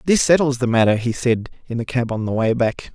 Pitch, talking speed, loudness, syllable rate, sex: 125 Hz, 265 wpm, -19 LUFS, 5.8 syllables/s, male